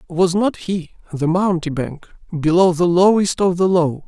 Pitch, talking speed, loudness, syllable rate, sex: 175 Hz, 160 wpm, -17 LUFS, 4.4 syllables/s, male